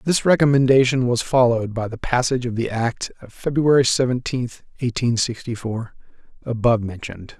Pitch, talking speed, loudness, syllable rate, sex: 120 Hz, 145 wpm, -20 LUFS, 5.5 syllables/s, male